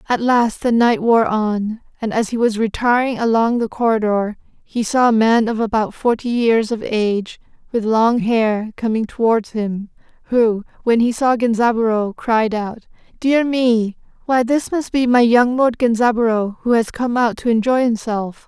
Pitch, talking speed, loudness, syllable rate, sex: 230 Hz, 175 wpm, -17 LUFS, 4.5 syllables/s, female